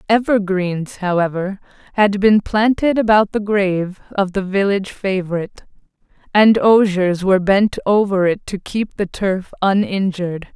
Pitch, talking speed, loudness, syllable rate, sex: 195 Hz, 130 wpm, -17 LUFS, 4.5 syllables/s, female